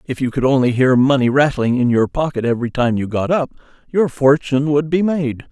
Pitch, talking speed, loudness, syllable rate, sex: 135 Hz, 220 wpm, -16 LUFS, 5.7 syllables/s, male